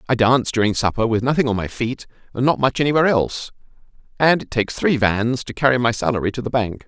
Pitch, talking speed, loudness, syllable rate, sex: 120 Hz, 225 wpm, -19 LUFS, 6.6 syllables/s, male